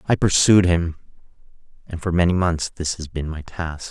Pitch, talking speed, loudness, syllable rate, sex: 85 Hz, 185 wpm, -20 LUFS, 5.0 syllables/s, male